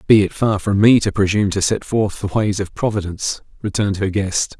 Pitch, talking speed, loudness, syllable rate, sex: 100 Hz, 220 wpm, -18 LUFS, 5.7 syllables/s, male